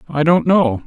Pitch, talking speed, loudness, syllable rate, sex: 155 Hz, 210 wpm, -15 LUFS, 4.4 syllables/s, male